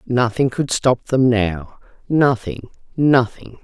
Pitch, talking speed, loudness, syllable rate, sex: 120 Hz, 115 wpm, -18 LUFS, 3.4 syllables/s, female